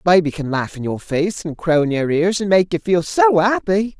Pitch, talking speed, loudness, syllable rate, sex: 175 Hz, 255 wpm, -18 LUFS, 5.2 syllables/s, male